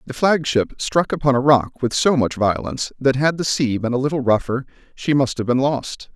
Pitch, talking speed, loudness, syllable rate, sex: 130 Hz, 235 wpm, -19 LUFS, 5.3 syllables/s, male